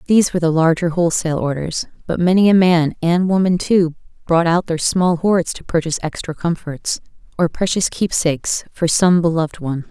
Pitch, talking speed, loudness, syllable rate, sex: 170 Hz, 175 wpm, -17 LUFS, 5.5 syllables/s, female